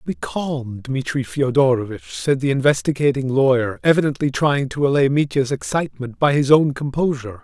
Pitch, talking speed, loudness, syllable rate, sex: 135 Hz, 145 wpm, -19 LUFS, 5.2 syllables/s, male